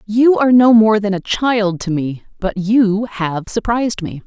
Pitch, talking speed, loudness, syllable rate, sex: 210 Hz, 195 wpm, -15 LUFS, 4.4 syllables/s, female